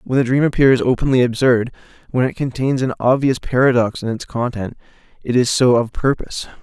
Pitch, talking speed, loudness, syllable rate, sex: 125 Hz, 180 wpm, -17 LUFS, 5.6 syllables/s, male